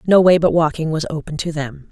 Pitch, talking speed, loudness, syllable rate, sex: 160 Hz, 250 wpm, -17 LUFS, 5.8 syllables/s, female